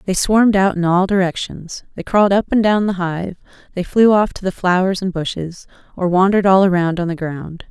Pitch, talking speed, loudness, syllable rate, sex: 185 Hz, 220 wpm, -16 LUFS, 5.5 syllables/s, female